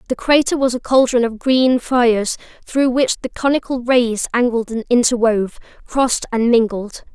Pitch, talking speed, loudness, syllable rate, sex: 245 Hz, 160 wpm, -17 LUFS, 4.9 syllables/s, female